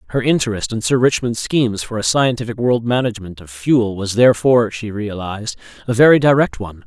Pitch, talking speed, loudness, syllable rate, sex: 115 Hz, 185 wpm, -16 LUFS, 6.0 syllables/s, male